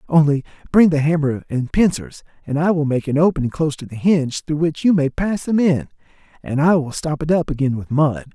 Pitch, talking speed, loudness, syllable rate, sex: 150 Hz, 230 wpm, -18 LUFS, 5.7 syllables/s, male